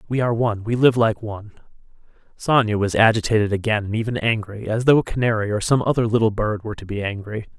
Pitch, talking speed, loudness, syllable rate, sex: 110 Hz, 215 wpm, -20 LUFS, 6.6 syllables/s, male